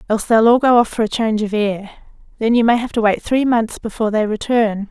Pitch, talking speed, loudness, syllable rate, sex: 225 Hz, 255 wpm, -16 LUFS, 6.1 syllables/s, female